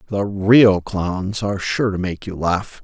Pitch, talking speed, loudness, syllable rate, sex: 95 Hz, 190 wpm, -18 LUFS, 3.9 syllables/s, male